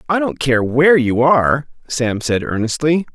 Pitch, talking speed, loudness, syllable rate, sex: 140 Hz, 170 wpm, -16 LUFS, 4.7 syllables/s, male